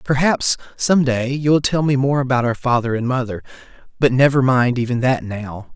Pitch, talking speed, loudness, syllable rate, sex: 130 Hz, 155 wpm, -18 LUFS, 4.9 syllables/s, male